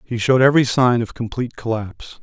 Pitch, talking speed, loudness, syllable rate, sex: 120 Hz, 190 wpm, -18 LUFS, 6.6 syllables/s, male